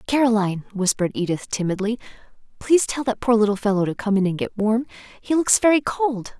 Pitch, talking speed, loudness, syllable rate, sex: 220 Hz, 180 wpm, -21 LUFS, 6.2 syllables/s, female